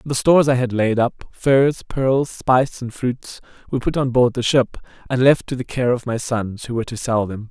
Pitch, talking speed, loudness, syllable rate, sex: 125 Hz, 225 wpm, -19 LUFS, 5.0 syllables/s, male